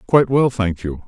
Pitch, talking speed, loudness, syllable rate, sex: 110 Hz, 225 wpm, -18 LUFS, 5.5 syllables/s, male